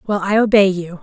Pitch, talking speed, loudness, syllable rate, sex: 195 Hz, 235 wpm, -15 LUFS, 5.5 syllables/s, female